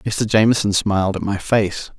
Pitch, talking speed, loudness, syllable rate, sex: 105 Hz, 180 wpm, -18 LUFS, 4.8 syllables/s, male